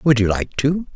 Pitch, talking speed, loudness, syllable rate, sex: 125 Hz, 250 wpm, -19 LUFS, 4.7 syllables/s, male